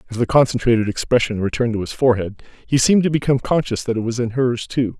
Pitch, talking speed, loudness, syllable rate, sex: 120 Hz, 230 wpm, -18 LUFS, 7.1 syllables/s, male